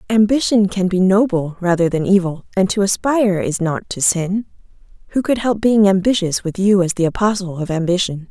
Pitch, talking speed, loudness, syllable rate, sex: 190 Hz, 190 wpm, -17 LUFS, 5.3 syllables/s, female